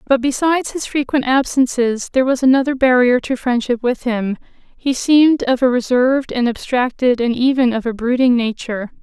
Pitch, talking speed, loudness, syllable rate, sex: 255 Hz, 175 wpm, -16 LUFS, 5.4 syllables/s, female